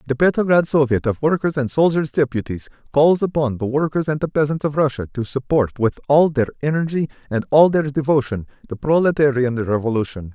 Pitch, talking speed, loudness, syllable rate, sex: 140 Hz, 175 wpm, -19 LUFS, 5.7 syllables/s, male